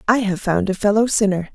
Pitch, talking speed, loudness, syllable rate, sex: 205 Hz, 235 wpm, -18 LUFS, 5.9 syllables/s, female